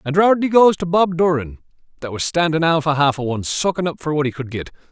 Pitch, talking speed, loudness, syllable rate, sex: 155 Hz, 255 wpm, -18 LUFS, 6.0 syllables/s, male